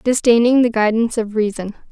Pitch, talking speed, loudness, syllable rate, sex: 225 Hz, 155 wpm, -16 LUFS, 6.0 syllables/s, female